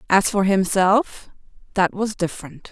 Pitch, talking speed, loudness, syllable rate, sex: 195 Hz, 110 wpm, -20 LUFS, 4.4 syllables/s, female